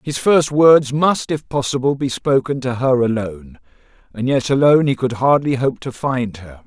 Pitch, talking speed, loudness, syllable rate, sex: 130 Hz, 190 wpm, -17 LUFS, 4.8 syllables/s, male